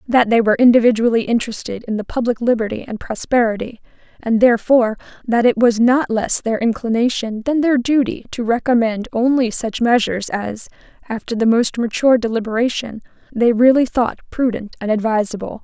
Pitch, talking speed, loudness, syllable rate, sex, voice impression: 230 Hz, 155 wpm, -17 LUFS, 5.7 syllables/s, female, very feminine, slightly young, slightly adult-like, very thin, slightly tensed, slightly weak, slightly dark, slightly hard, clear, fluent, slightly raspy, very cute, intellectual, slightly refreshing, sincere, slightly calm, very friendly, very reassuring, unique, elegant, very sweet, lively, kind, slightly modest